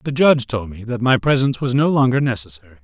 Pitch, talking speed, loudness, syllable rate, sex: 120 Hz, 235 wpm, -18 LUFS, 7.0 syllables/s, male